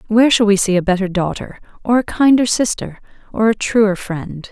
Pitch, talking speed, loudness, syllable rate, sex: 210 Hz, 200 wpm, -16 LUFS, 5.3 syllables/s, female